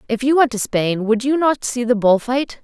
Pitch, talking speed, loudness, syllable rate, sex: 245 Hz, 275 wpm, -17 LUFS, 4.9 syllables/s, female